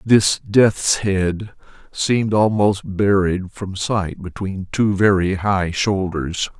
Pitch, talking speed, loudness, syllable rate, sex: 100 Hz, 120 wpm, -19 LUFS, 3.2 syllables/s, male